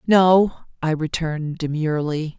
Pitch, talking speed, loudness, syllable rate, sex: 160 Hz, 100 wpm, -21 LUFS, 4.6 syllables/s, female